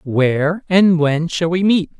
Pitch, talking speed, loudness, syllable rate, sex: 170 Hz, 180 wpm, -16 LUFS, 3.8 syllables/s, male